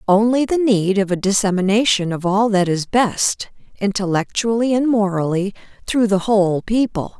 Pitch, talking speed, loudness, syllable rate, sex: 205 Hz, 150 wpm, -18 LUFS, 4.8 syllables/s, female